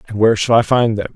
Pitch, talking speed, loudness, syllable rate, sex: 110 Hz, 315 wpm, -15 LUFS, 7.2 syllables/s, male